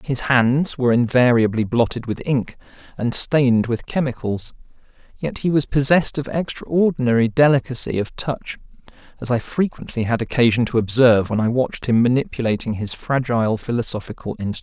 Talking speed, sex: 150 wpm, male